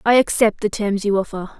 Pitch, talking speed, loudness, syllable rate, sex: 210 Hz, 225 wpm, -19 LUFS, 5.6 syllables/s, female